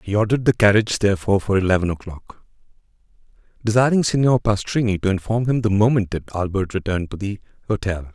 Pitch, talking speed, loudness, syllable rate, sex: 105 Hz, 160 wpm, -20 LUFS, 6.6 syllables/s, male